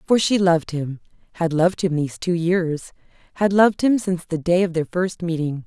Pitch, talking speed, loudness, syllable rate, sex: 175 Hz, 210 wpm, -20 LUFS, 5.7 syllables/s, female